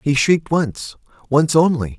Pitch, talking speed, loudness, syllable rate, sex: 145 Hz, 120 wpm, -17 LUFS, 4.3 syllables/s, male